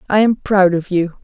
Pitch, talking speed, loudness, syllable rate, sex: 190 Hz, 245 wpm, -15 LUFS, 5.1 syllables/s, female